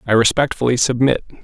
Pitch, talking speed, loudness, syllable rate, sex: 125 Hz, 125 wpm, -16 LUFS, 6.3 syllables/s, male